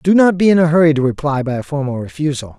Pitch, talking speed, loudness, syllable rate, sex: 150 Hz, 280 wpm, -15 LUFS, 6.7 syllables/s, male